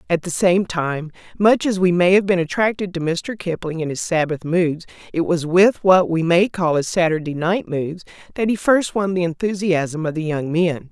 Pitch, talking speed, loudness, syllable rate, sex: 175 Hz, 215 wpm, -19 LUFS, 4.8 syllables/s, female